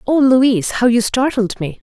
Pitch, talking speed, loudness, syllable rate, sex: 240 Hz, 180 wpm, -15 LUFS, 4.1 syllables/s, female